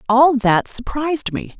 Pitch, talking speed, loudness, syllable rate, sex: 260 Hz, 150 wpm, -17 LUFS, 4.4 syllables/s, female